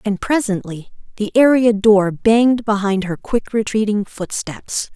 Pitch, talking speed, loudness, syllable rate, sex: 210 Hz, 135 wpm, -17 LUFS, 4.2 syllables/s, female